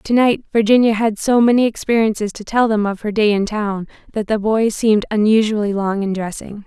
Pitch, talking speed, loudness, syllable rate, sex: 215 Hz, 205 wpm, -17 LUFS, 5.5 syllables/s, female